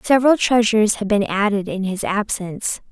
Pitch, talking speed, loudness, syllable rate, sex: 210 Hz, 165 wpm, -18 LUFS, 5.5 syllables/s, female